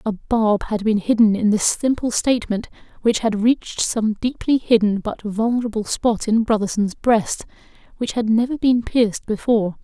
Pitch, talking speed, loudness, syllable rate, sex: 220 Hz, 165 wpm, -19 LUFS, 4.9 syllables/s, female